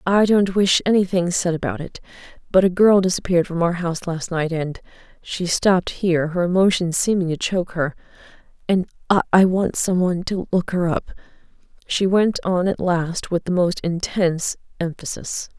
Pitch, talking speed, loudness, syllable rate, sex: 180 Hz, 165 wpm, -20 LUFS, 5.1 syllables/s, female